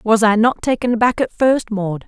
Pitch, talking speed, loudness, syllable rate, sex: 225 Hz, 230 wpm, -16 LUFS, 5.4 syllables/s, female